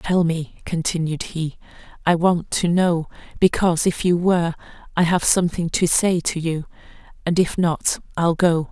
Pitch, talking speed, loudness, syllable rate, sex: 170 Hz, 145 wpm, -20 LUFS, 4.6 syllables/s, female